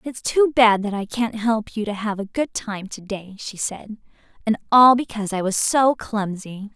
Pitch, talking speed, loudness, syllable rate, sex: 215 Hz, 215 wpm, -21 LUFS, 4.7 syllables/s, female